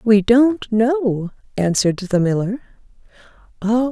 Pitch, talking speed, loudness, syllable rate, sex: 220 Hz, 90 wpm, -18 LUFS, 3.9 syllables/s, female